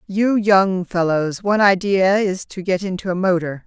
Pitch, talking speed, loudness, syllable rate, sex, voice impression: 190 Hz, 180 wpm, -18 LUFS, 4.5 syllables/s, female, very feminine, very adult-like, thin, tensed, relaxed, slightly powerful, bright, slightly soft, clear, slightly fluent, raspy, slightly cute, slightly intellectual, slightly refreshing, sincere, slightly calm, slightly friendly, slightly reassuring, unique, slightly elegant, wild, slightly sweet, lively, kind